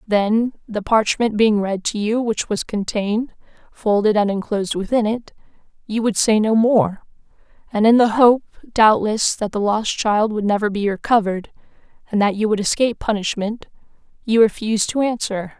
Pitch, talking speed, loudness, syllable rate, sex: 215 Hz, 165 wpm, -18 LUFS, 4.9 syllables/s, female